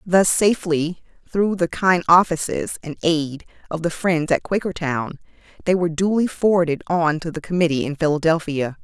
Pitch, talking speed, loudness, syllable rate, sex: 165 Hz, 155 wpm, -20 LUFS, 5.0 syllables/s, female